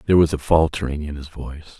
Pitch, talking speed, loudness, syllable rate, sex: 75 Hz, 235 wpm, -20 LUFS, 7.3 syllables/s, male